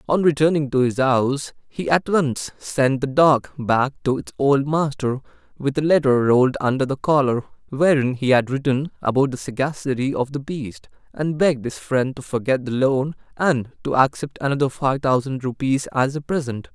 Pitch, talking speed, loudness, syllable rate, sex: 135 Hz, 185 wpm, -21 LUFS, 4.9 syllables/s, male